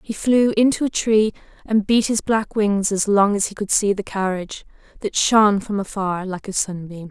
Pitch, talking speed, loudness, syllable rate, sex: 205 Hz, 210 wpm, -19 LUFS, 4.9 syllables/s, female